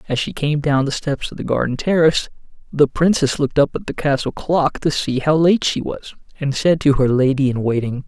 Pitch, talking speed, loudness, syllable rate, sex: 145 Hz, 230 wpm, -18 LUFS, 5.4 syllables/s, male